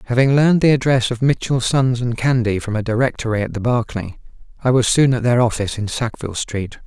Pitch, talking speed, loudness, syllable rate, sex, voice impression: 120 Hz, 210 wpm, -18 LUFS, 6.2 syllables/s, male, masculine, adult-like, slightly fluent, slightly friendly, slightly unique